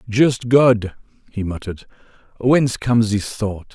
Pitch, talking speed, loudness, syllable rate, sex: 110 Hz, 130 wpm, -18 LUFS, 4.5 syllables/s, male